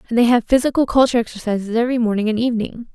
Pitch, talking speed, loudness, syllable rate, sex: 235 Hz, 205 wpm, -18 LUFS, 8.0 syllables/s, female